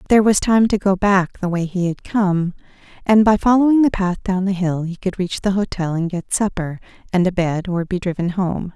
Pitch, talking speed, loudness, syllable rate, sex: 190 Hz, 235 wpm, -18 LUFS, 5.2 syllables/s, female